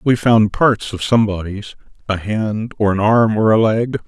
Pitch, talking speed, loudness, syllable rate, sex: 110 Hz, 190 wpm, -16 LUFS, 4.2 syllables/s, male